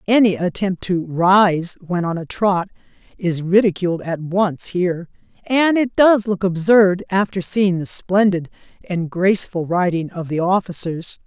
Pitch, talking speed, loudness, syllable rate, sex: 185 Hz, 150 wpm, -18 LUFS, 4.3 syllables/s, female